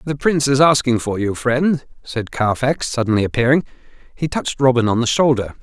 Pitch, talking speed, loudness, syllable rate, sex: 130 Hz, 180 wpm, -17 LUFS, 5.6 syllables/s, male